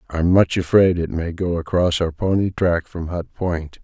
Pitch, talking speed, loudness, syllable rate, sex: 85 Hz, 205 wpm, -20 LUFS, 4.6 syllables/s, male